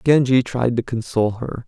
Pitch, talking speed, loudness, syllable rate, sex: 120 Hz, 180 wpm, -20 LUFS, 5.2 syllables/s, male